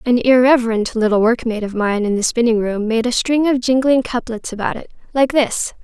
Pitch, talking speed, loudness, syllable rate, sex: 235 Hz, 205 wpm, -16 LUFS, 5.6 syllables/s, female